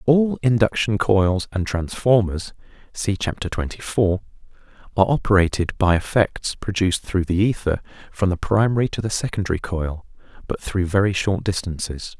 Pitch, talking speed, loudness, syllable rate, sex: 100 Hz, 140 wpm, -21 LUFS, 4.7 syllables/s, male